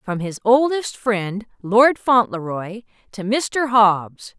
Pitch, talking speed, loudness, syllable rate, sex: 220 Hz, 125 wpm, -18 LUFS, 3.2 syllables/s, female